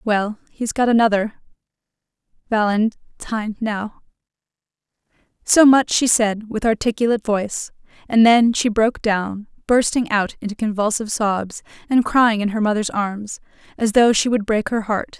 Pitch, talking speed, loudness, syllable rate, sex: 215 Hz, 135 wpm, -18 LUFS, 4.8 syllables/s, female